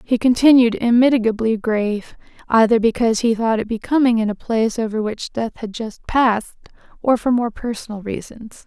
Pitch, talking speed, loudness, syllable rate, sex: 230 Hz, 165 wpm, -18 LUFS, 5.5 syllables/s, female